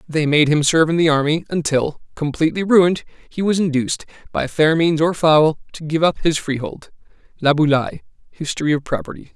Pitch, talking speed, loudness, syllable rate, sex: 155 Hz, 165 wpm, -18 LUFS, 5.6 syllables/s, male